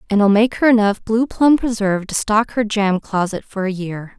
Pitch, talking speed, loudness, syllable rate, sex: 210 Hz, 230 wpm, -17 LUFS, 5.0 syllables/s, female